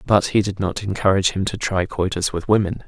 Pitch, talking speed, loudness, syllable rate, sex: 95 Hz, 230 wpm, -20 LUFS, 5.9 syllables/s, male